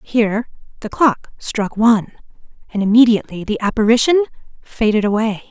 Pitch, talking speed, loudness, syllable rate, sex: 220 Hz, 120 wpm, -16 LUFS, 5.8 syllables/s, female